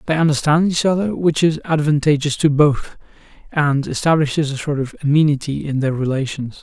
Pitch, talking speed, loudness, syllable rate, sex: 150 Hz, 165 wpm, -18 LUFS, 5.5 syllables/s, male